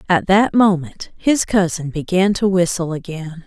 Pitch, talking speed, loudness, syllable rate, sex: 180 Hz, 155 wpm, -17 LUFS, 4.3 syllables/s, female